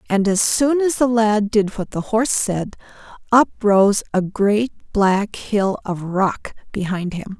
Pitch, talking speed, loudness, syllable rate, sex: 205 Hz, 170 wpm, -18 LUFS, 3.8 syllables/s, female